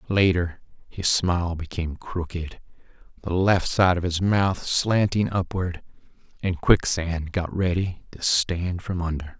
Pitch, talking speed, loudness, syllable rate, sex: 90 Hz, 135 wpm, -24 LUFS, 4.0 syllables/s, male